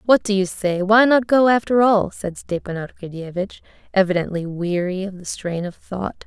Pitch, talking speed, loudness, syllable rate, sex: 195 Hz, 180 wpm, -20 LUFS, 4.8 syllables/s, female